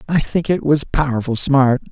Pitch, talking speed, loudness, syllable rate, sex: 140 Hz, 190 wpm, -17 LUFS, 4.8 syllables/s, male